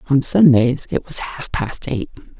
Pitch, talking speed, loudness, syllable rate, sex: 135 Hz, 175 wpm, -17 LUFS, 4.2 syllables/s, female